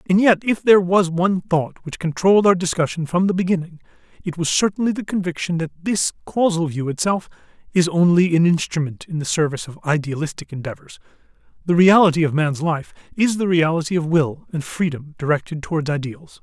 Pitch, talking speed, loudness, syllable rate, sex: 170 Hz, 180 wpm, -19 LUFS, 5.8 syllables/s, male